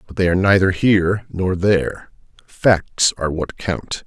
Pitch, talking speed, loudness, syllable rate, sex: 90 Hz, 160 wpm, -18 LUFS, 4.5 syllables/s, male